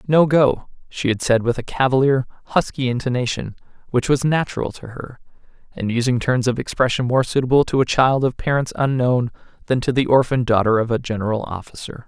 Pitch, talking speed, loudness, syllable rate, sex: 125 Hz, 185 wpm, -19 LUFS, 5.8 syllables/s, male